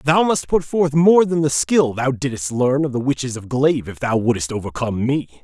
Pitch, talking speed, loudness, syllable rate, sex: 140 Hz, 230 wpm, -18 LUFS, 5.0 syllables/s, male